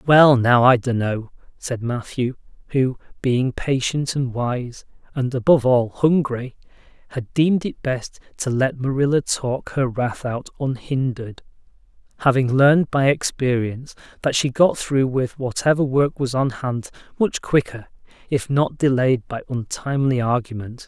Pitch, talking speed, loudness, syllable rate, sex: 130 Hz, 140 wpm, -20 LUFS, 4.4 syllables/s, male